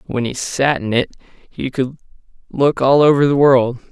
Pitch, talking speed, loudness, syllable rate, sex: 135 Hz, 185 wpm, -16 LUFS, 4.5 syllables/s, male